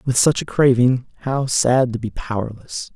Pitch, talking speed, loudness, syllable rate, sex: 125 Hz, 185 wpm, -19 LUFS, 4.6 syllables/s, male